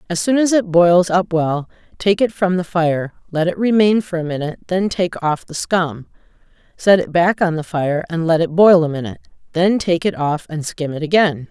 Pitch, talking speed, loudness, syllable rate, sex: 175 Hz, 220 wpm, -17 LUFS, 5.1 syllables/s, female